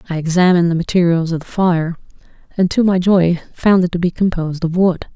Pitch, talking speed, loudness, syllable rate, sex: 175 Hz, 210 wpm, -16 LUFS, 5.9 syllables/s, female